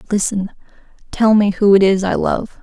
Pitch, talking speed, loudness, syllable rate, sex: 200 Hz, 185 wpm, -15 LUFS, 4.9 syllables/s, female